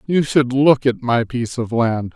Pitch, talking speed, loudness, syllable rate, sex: 125 Hz, 220 wpm, -17 LUFS, 4.5 syllables/s, male